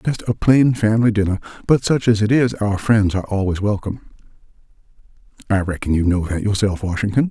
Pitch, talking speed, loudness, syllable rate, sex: 105 Hz, 180 wpm, -18 LUFS, 6.0 syllables/s, male